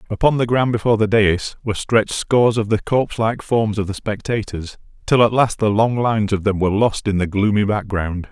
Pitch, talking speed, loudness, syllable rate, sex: 105 Hz, 215 wpm, -18 LUFS, 5.8 syllables/s, male